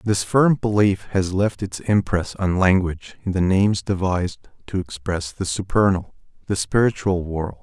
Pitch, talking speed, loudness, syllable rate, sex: 95 Hz, 155 wpm, -21 LUFS, 4.7 syllables/s, male